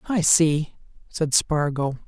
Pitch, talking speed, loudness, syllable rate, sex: 155 Hz, 115 wpm, -21 LUFS, 3.3 syllables/s, male